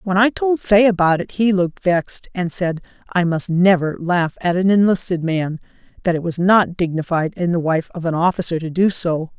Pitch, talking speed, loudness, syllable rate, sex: 180 Hz, 205 wpm, -18 LUFS, 5.1 syllables/s, female